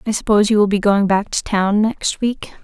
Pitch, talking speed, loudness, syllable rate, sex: 205 Hz, 250 wpm, -17 LUFS, 5.3 syllables/s, female